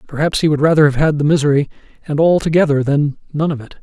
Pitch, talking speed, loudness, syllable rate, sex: 150 Hz, 235 wpm, -15 LUFS, 6.8 syllables/s, male